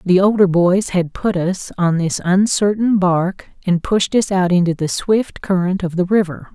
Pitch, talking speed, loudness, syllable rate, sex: 185 Hz, 190 wpm, -17 LUFS, 4.3 syllables/s, female